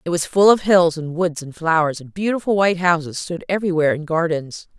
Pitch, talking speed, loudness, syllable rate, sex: 170 Hz, 215 wpm, -19 LUFS, 5.9 syllables/s, female